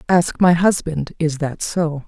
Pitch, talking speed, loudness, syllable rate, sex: 160 Hz, 175 wpm, -18 LUFS, 3.8 syllables/s, female